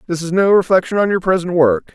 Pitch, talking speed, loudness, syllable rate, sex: 175 Hz, 245 wpm, -15 LUFS, 6.2 syllables/s, male